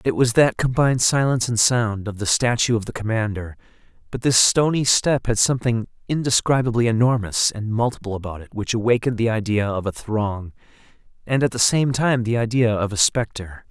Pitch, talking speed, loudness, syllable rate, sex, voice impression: 115 Hz, 185 wpm, -20 LUFS, 5.6 syllables/s, male, very masculine, very middle-aged, thick, slightly tensed, powerful, slightly bright, soft, slightly muffled, fluent, raspy, slightly cool, intellectual, slightly refreshing, slightly sincere, calm, mature, slightly friendly, slightly reassuring, unique, slightly elegant, very wild, slightly sweet, lively, kind, slightly modest